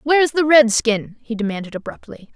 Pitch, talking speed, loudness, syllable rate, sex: 245 Hz, 180 wpm, -17 LUFS, 5.8 syllables/s, female